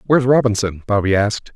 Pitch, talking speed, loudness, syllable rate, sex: 115 Hz, 155 wpm, -17 LUFS, 6.7 syllables/s, male